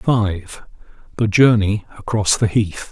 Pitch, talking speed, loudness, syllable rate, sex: 105 Hz, 105 wpm, -17 LUFS, 4.1 syllables/s, male